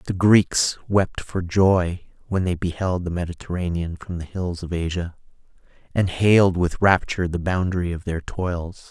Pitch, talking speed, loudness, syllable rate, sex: 90 Hz, 160 wpm, -22 LUFS, 4.6 syllables/s, male